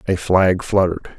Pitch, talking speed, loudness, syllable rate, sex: 90 Hz, 150 wpm, -17 LUFS, 5.9 syllables/s, male